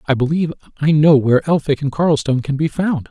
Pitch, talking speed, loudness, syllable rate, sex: 150 Hz, 215 wpm, -16 LUFS, 6.6 syllables/s, male